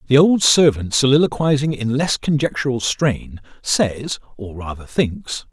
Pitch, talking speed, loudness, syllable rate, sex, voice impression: 135 Hz, 130 wpm, -18 LUFS, 4.3 syllables/s, male, masculine, very adult-like, slightly intellectual, sincere, calm, reassuring